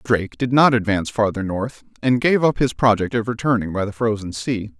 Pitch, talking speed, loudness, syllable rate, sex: 115 Hz, 215 wpm, -20 LUFS, 5.6 syllables/s, male